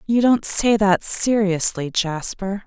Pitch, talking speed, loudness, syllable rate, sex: 200 Hz, 135 wpm, -18 LUFS, 3.6 syllables/s, female